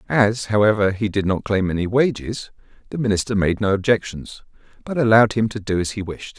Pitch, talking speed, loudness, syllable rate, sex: 105 Hz, 195 wpm, -20 LUFS, 5.7 syllables/s, male